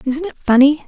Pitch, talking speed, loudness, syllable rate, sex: 285 Hz, 205 wpm, -15 LUFS, 5.2 syllables/s, female